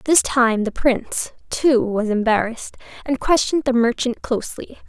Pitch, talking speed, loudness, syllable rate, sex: 245 Hz, 150 wpm, -19 LUFS, 5.0 syllables/s, female